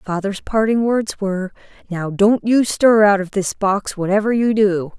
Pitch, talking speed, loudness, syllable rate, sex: 205 Hz, 180 wpm, -17 LUFS, 4.4 syllables/s, female